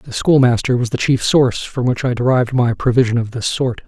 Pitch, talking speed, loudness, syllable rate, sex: 125 Hz, 230 wpm, -16 LUFS, 5.8 syllables/s, male